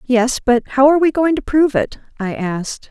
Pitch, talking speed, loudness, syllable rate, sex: 260 Hz, 225 wpm, -16 LUFS, 5.5 syllables/s, female